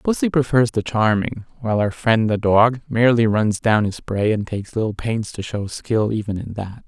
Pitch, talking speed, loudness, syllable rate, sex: 110 Hz, 210 wpm, -20 LUFS, 5.1 syllables/s, male